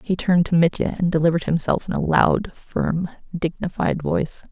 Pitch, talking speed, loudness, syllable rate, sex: 170 Hz, 175 wpm, -21 LUFS, 5.5 syllables/s, female